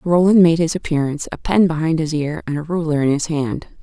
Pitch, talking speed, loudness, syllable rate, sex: 160 Hz, 235 wpm, -18 LUFS, 5.8 syllables/s, female